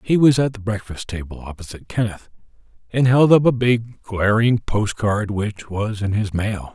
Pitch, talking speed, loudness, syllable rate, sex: 110 Hz, 185 wpm, -19 LUFS, 4.6 syllables/s, male